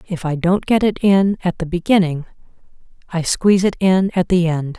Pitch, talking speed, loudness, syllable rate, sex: 180 Hz, 200 wpm, -17 LUFS, 5.1 syllables/s, female